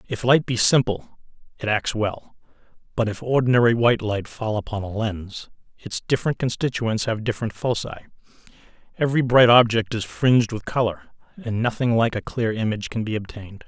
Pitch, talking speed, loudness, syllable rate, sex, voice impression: 115 Hz, 165 wpm, -22 LUFS, 5.7 syllables/s, male, very masculine, middle-aged, slightly thick, sincere, slightly calm, slightly unique